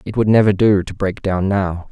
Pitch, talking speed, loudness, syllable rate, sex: 100 Hz, 250 wpm, -16 LUFS, 5.0 syllables/s, male